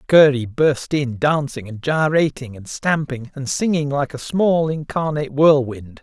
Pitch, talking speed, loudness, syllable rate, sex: 140 Hz, 150 wpm, -19 LUFS, 4.3 syllables/s, male